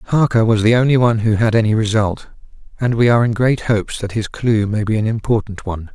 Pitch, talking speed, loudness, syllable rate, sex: 110 Hz, 230 wpm, -16 LUFS, 6.1 syllables/s, male